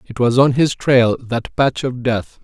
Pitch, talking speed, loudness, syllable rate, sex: 125 Hz, 220 wpm, -16 LUFS, 4.0 syllables/s, male